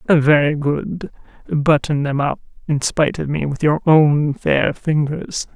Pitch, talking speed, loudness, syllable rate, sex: 150 Hz, 150 wpm, -17 LUFS, 3.9 syllables/s, female